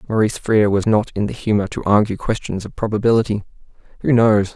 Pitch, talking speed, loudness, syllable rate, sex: 105 Hz, 185 wpm, -18 LUFS, 6.5 syllables/s, male